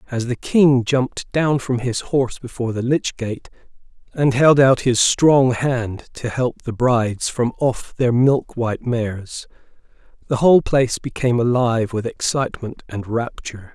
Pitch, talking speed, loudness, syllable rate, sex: 125 Hz, 160 wpm, -19 LUFS, 4.6 syllables/s, male